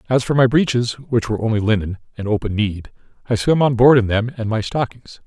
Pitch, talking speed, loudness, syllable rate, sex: 115 Hz, 230 wpm, -18 LUFS, 5.7 syllables/s, male